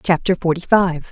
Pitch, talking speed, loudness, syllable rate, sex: 175 Hz, 160 wpm, -17 LUFS, 5.0 syllables/s, female